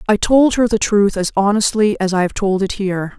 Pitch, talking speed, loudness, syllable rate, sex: 205 Hz, 245 wpm, -16 LUFS, 5.4 syllables/s, female